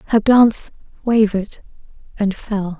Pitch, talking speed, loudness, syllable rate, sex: 210 Hz, 105 wpm, -17 LUFS, 4.9 syllables/s, female